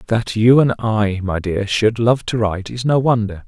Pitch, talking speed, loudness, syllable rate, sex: 110 Hz, 225 wpm, -17 LUFS, 4.6 syllables/s, male